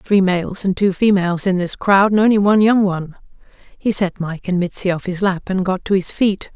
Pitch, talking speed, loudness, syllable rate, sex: 190 Hz, 240 wpm, -17 LUFS, 5.3 syllables/s, female